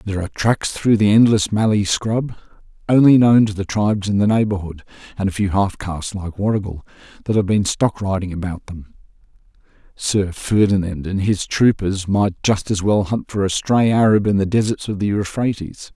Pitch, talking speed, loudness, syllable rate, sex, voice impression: 100 Hz, 190 wpm, -18 LUFS, 5.2 syllables/s, male, very masculine, very adult-like, muffled, cool, intellectual, mature, elegant, slightly sweet